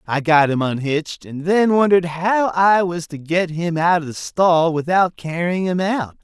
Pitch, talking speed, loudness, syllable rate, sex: 170 Hz, 200 wpm, -18 LUFS, 4.5 syllables/s, male